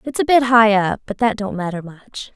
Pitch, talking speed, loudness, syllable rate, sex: 215 Hz, 255 wpm, -17 LUFS, 5.0 syllables/s, female